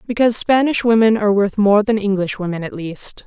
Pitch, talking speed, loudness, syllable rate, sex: 210 Hz, 200 wpm, -16 LUFS, 5.8 syllables/s, female